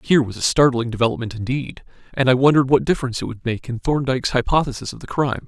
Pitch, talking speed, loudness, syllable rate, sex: 130 Hz, 220 wpm, -20 LUFS, 7.3 syllables/s, male